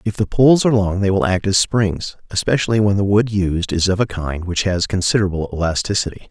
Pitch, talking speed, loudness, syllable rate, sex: 100 Hz, 220 wpm, -17 LUFS, 6.0 syllables/s, male